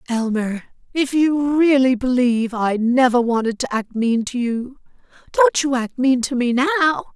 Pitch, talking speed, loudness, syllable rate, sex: 255 Hz, 160 wpm, -18 LUFS, 4.3 syllables/s, female